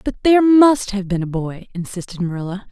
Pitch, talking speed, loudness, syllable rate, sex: 210 Hz, 200 wpm, -17 LUFS, 5.8 syllables/s, female